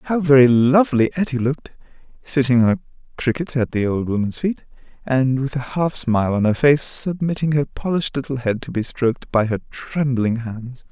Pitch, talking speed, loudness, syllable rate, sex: 130 Hz, 185 wpm, -19 LUFS, 5.3 syllables/s, male